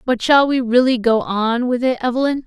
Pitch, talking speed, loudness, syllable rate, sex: 245 Hz, 220 wpm, -16 LUFS, 5.2 syllables/s, female